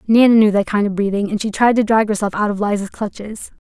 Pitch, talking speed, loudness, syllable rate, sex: 210 Hz, 265 wpm, -16 LUFS, 6.2 syllables/s, female